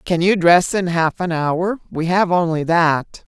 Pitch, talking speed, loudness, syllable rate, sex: 175 Hz, 195 wpm, -17 LUFS, 3.9 syllables/s, female